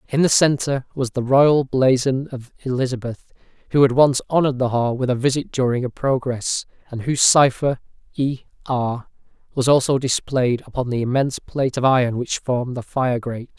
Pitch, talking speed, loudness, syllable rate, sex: 130 Hz, 175 wpm, -20 LUFS, 5.3 syllables/s, male